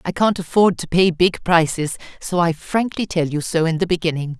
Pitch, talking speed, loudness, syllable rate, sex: 170 Hz, 220 wpm, -19 LUFS, 5.2 syllables/s, female